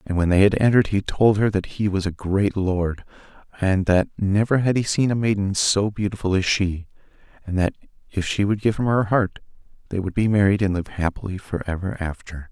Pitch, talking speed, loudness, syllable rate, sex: 100 Hz, 215 wpm, -21 LUFS, 5.3 syllables/s, male